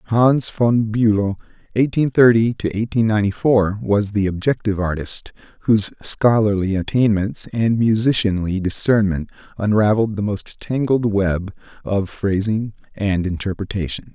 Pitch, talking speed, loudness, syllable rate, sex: 105 Hz, 120 wpm, -19 LUFS, 4.0 syllables/s, male